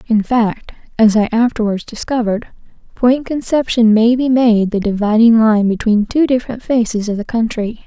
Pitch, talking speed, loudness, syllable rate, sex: 230 Hz, 160 wpm, -14 LUFS, 5.0 syllables/s, female